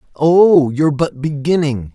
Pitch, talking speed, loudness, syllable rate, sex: 150 Hz, 125 wpm, -14 LUFS, 4.3 syllables/s, male